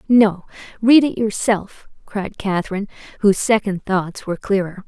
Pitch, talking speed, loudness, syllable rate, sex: 205 Hz, 135 wpm, -19 LUFS, 4.9 syllables/s, female